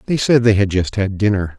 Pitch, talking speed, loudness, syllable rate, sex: 105 Hz, 265 wpm, -16 LUFS, 5.7 syllables/s, male